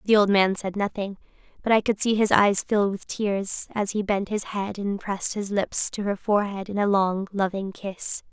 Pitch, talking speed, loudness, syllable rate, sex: 200 Hz, 225 wpm, -24 LUFS, 4.8 syllables/s, female